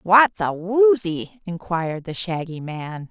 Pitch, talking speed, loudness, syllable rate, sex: 185 Hz, 135 wpm, -21 LUFS, 3.7 syllables/s, female